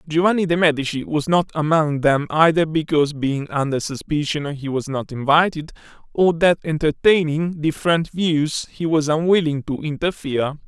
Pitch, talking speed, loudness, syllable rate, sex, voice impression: 155 Hz, 145 wpm, -19 LUFS, 5.0 syllables/s, male, masculine, adult-like, slightly refreshing, sincere, slightly friendly, kind